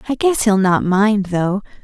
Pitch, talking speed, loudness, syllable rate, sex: 210 Hz, 195 wpm, -16 LUFS, 4.1 syllables/s, female